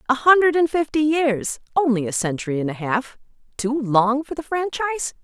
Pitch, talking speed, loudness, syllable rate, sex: 265 Hz, 185 wpm, -20 LUFS, 4.3 syllables/s, female